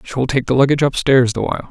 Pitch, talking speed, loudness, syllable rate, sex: 135 Hz, 245 wpm, -16 LUFS, 6.8 syllables/s, male